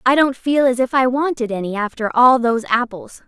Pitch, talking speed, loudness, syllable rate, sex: 250 Hz, 220 wpm, -17 LUFS, 5.4 syllables/s, female